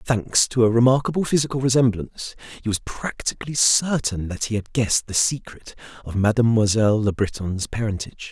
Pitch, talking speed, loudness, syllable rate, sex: 115 Hz, 150 wpm, -21 LUFS, 5.7 syllables/s, male